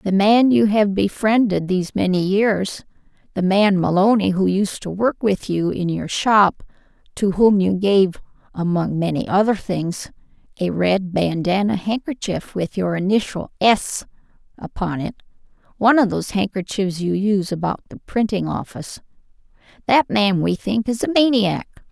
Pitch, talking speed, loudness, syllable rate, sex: 200 Hz, 145 wpm, -19 LUFS, 4.6 syllables/s, female